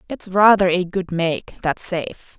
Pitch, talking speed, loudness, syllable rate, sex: 185 Hz, 175 wpm, -19 LUFS, 4.3 syllables/s, female